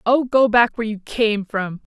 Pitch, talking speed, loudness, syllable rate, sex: 225 Hz, 210 wpm, -19 LUFS, 5.0 syllables/s, female